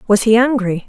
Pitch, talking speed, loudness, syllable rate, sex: 220 Hz, 205 wpm, -14 LUFS, 5.6 syllables/s, female